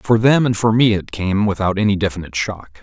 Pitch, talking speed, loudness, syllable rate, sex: 105 Hz, 235 wpm, -17 LUFS, 5.7 syllables/s, male